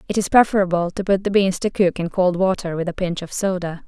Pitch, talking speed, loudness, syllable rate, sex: 185 Hz, 265 wpm, -20 LUFS, 6.0 syllables/s, female